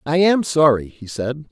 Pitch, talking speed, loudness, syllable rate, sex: 140 Hz, 200 wpm, -18 LUFS, 4.4 syllables/s, male